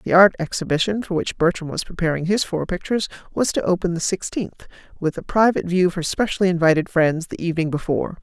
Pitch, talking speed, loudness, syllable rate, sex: 175 Hz, 195 wpm, -21 LUFS, 6.4 syllables/s, female